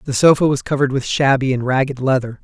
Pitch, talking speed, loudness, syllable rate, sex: 135 Hz, 220 wpm, -16 LUFS, 6.6 syllables/s, male